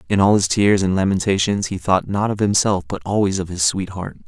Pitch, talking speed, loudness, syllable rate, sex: 95 Hz, 225 wpm, -18 LUFS, 5.6 syllables/s, male